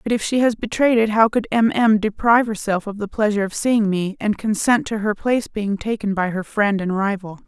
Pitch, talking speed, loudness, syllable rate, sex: 210 Hz, 240 wpm, -19 LUFS, 5.5 syllables/s, female